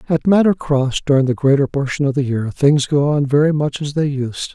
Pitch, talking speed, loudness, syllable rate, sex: 145 Hz, 240 wpm, -17 LUFS, 5.3 syllables/s, male